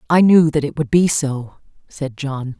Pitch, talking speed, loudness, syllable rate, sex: 145 Hz, 210 wpm, -17 LUFS, 4.3 syllables/s, female